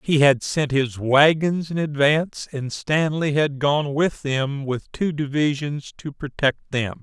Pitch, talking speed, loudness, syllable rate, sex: 145 Hz, 160 wpm, -21 LUFS, 3.9 syllables/s, male